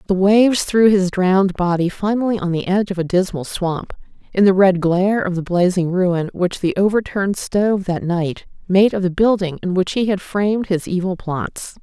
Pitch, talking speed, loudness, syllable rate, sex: 190 Hz, 205 wpm, -18 LUFS, 5.1 syllables/s, female